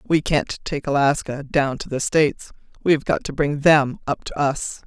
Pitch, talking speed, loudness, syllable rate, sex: 145 Hz, 185 wpm, -21 LUFS, 4.7 syllables/s, female